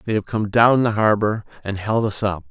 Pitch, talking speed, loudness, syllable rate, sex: 105 Hz, 240 wpm, -19 LUFS, 5.1 syllables/s, male